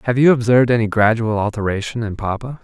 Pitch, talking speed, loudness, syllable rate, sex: 115 Hz, 180 wpm, -17 LUFS, 6.4 syllables/s, male